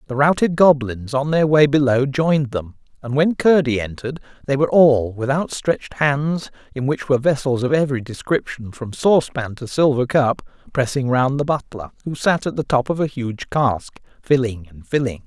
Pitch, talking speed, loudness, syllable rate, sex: 135 Hz, 190 wpm, -19 LUFS, 5.3 syllables/s, male